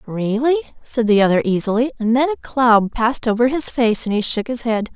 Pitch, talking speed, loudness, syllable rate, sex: 235 Hz, 220 wpm, -17 LUFS, 5.6 syllables/s, female